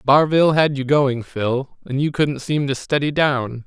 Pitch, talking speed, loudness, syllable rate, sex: 140 Hz, 195 wpm, -19 LUFS, 4.3 syllables/s, male